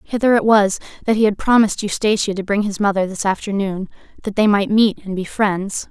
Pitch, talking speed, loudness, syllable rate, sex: 205 Hz, 215 wpm, -17 LUFS, 5.7 syllables/s, female